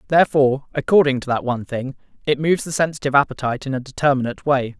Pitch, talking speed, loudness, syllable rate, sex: 140 Hz, 190 wpm, -19 LUFS, 7.7 syllables/s, male